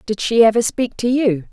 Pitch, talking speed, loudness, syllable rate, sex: 225 Hz, 235 wpm, -16 LUFS, 5.2 syllables/s, female